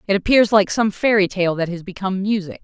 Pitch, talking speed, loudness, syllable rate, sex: 195 Hz, 230 wpm, -18 LUFS, 6.1 syllables/s, female